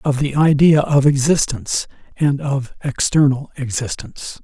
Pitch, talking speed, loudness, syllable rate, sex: 145 Hz, 120 wpm, -17 LUFS, 4.6 syllables/s, male